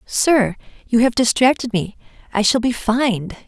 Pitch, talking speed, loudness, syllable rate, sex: 235 Hz, 155 wpm, -18 LUFS, 4.6 syllables/s, female